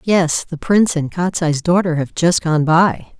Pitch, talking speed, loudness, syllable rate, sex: 170 Hz, 190 wpm, -16 LUFS, 4.2 syllables/s, female